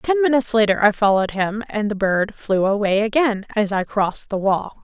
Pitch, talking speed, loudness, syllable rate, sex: 210 Hz, 210 wpm, -19 LUFS, 5.5 syllables/s, female